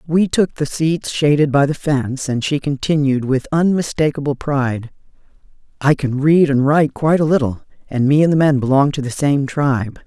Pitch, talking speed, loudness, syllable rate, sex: 145 Hz, 190 wpm, -16 LUFS, 5.3 syllables/s, female